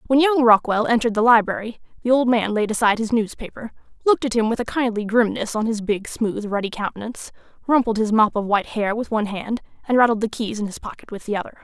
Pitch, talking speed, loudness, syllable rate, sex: 225 Hz, 230 wpm, -20 LUFS, 6.5 syllables/s, female